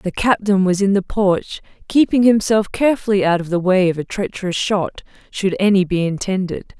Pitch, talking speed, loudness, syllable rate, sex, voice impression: 195 Hz, 185 wpm, -17 LUFS, 5.1 syllables/s, female, feminine, adult-like, tensed, powerful, slightly cool